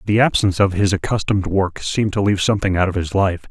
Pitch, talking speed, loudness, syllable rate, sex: 100 Hz, 240 wpm, -18 LUFS, 6.9 syllables/s, male